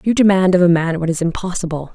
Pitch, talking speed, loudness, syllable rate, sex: 175 Hz, 245 wpm, -16 LUFS, 6.5 syllables/s, female